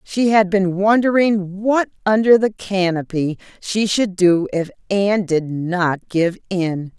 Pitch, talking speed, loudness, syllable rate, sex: 190 Hz, 145 wpm, -18 LUFS, 3.8 syllables/s, female